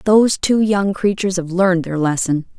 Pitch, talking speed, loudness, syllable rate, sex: 185 Hz, 185 wpm, -17 LUFS, 5.5 syllables/s, female